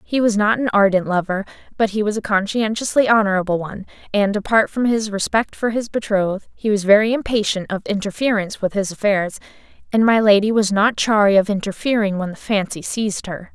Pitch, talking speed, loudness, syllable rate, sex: 205 Hz, 190 wpm, -18 LUFS, 5.8 syllables/s, female